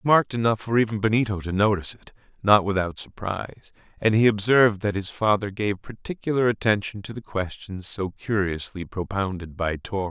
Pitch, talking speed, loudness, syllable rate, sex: 105 Hz, 180 wpm, -24 LUFS, 5.7 syllables/s, male